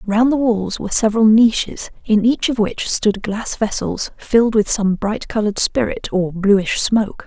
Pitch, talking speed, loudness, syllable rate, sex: 215 Hz, 180 wpm, -17 LUFS, 4.6 syllables/s, female